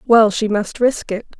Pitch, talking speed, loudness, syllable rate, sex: 230 Hz, 215 wpm, -17 LUFS, 4.4 syllables/s, female